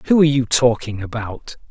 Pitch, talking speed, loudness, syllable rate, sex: 125 Hz, 175 wpm, -18 LUFS, 5.7 syllables/s, male